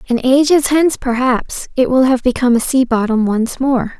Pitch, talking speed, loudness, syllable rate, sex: 255 Hz, 195 wpm, -14 LUFS, 5.1 syllables/s, female